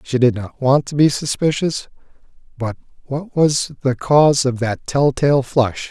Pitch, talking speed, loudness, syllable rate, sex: 135 Hz, 175 wpm, -18 LUFS, 4.2 syllables/s, male